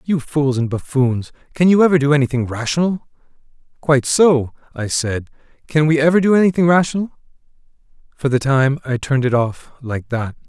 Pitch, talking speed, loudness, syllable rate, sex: 140 Hz, 165 wpm, -17 LUFS, 5.5 syllables/s, male